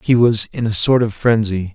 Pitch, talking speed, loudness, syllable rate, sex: 110 Hz, 240 wpm, -16 LUFS, 5.0 syllables/s, male